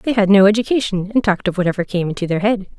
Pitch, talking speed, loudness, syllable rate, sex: 200 Hz, 260 wpm, -16 LUFS, 7.1 syllables/s, female